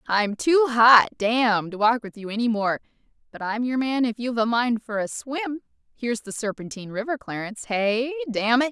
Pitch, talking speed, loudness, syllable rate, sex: 235 Hz, 180 wpm, -23 LUFS, 5.4 syllables/s, female